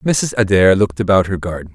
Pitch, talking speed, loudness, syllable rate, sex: 100 Hz, 205 wpm, -15 LUFS, 6.0 syllables/s, male